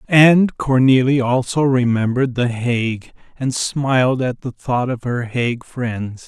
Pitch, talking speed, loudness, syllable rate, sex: 125 Hz, 145 wpm, -17 LUFS, 4.1 syllables/s, male